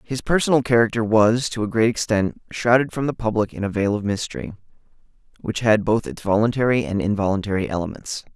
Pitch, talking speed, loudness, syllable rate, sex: 110 Hz, 180 wpm, -21 LUFS, 6.0 syllables/s, male